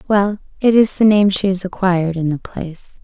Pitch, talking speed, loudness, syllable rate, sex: 190 Hz, 200 wpm, -16 LUFS, 5.3 syllables/s, female